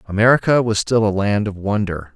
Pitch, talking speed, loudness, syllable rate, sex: 105 Hz, 195 wpm, -17 LUFS, 5.6 syllables/s, male